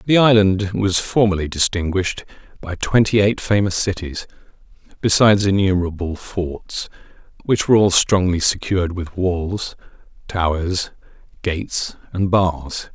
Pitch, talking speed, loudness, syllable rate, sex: 95 Hz, 110 wpm, -18 LUFS, 4.5 syllables/s, male